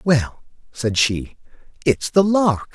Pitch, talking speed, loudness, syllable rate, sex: 140 Hz, 130 wpm, -19 LUFS, 3.2 syllables/s, male